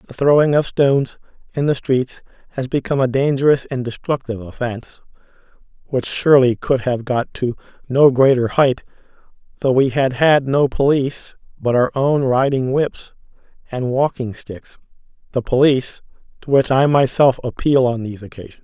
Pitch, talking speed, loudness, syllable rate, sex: 130 Hz, 150 wpm, -17 LUFS, 5.1 syllables/s, male